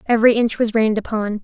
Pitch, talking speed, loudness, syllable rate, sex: 220 Hz, 210 wpm, -17 LUFS, 7.0 syllables/s, female